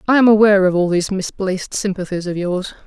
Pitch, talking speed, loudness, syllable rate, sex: 190 Hz, 210 wpm, -17 LUFS, 6.5 syllables/s, female